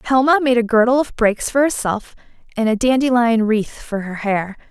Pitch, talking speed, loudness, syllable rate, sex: 235 Hz, 190 wpm, -17 LUFS, 5.2 syllables/s, female